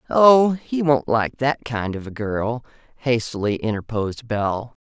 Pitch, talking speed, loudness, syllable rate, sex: 120 Hz, 150 wpm, -21 LUFS, 4.3 syllables/s, female